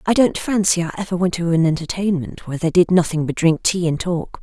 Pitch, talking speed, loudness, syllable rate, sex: 175 Hz, 245 wpm, -19 LUFS, 5.9 syllables/s, female